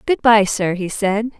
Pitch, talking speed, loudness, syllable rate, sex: 210 Hz, 215 wpm, -17 LUFS, 4.1 syllables/s, female